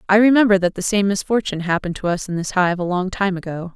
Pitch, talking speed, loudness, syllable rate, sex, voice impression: 190 Hz, 255 wpm, -19 LUFS, 6.7 syllables/s, female, feminine, middle-aged, tensed, hard, slightly fluent, intellectual, calm, reassuring, elegant, slightly strict, slightly sharp